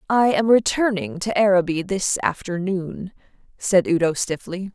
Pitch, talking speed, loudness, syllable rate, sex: 190 Hz, 125 wpm, -20 LUFS, 4.4 syllables/s, female